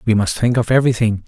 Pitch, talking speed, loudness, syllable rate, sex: 110 Hz, 235 wpm, -16 LUFS, 7.0 syllables/s, male